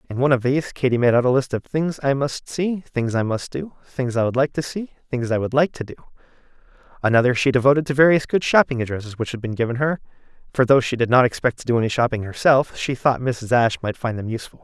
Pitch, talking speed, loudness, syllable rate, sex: 130 Hz, 255 wpm, -20 LUFS, 6.5 syllables/s, male